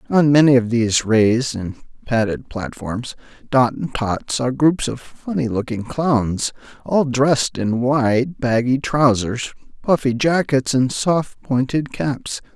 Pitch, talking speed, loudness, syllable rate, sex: 125 Hz, 140 wpm, -19 LUFS, 3.8 syllables/s, male